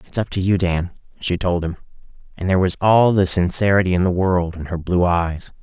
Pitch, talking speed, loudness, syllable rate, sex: 90 Hz, 225 wpm, -19 LUFS, 5.5 syllables/s, male